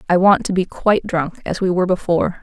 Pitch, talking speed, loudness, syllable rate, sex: 180 Hz, 245 wpm, -18 LUFS, 6.4 syllables/s, female